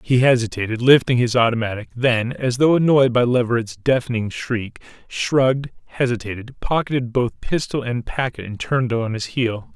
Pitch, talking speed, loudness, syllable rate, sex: 120 Hz, 155 wpm, -19 LUFS, 5.1 syllables/s, male